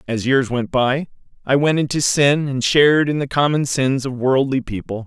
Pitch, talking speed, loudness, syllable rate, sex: 135 Hz, 200 wpm, -18 LUFS, 4.8 syllables/s, male